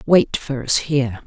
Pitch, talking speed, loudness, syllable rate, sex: 135 Hz, 190 wpm, -19 LUFS, 4.4 syllables/s, female